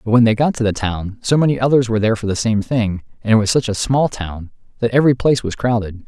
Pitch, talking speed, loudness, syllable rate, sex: 115 Hz, 275 wpm, -17 LUFS, 6.6 syllables/s, male